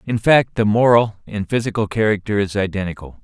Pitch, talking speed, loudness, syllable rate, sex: 105 Hz, 165 wpm, -18 LUFS, 5.6 syllables/s, male